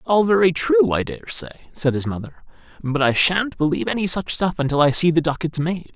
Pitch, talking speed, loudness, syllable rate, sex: 155 Hz, 210 wpm, -19 LUFS, 5.8 syllables/s, male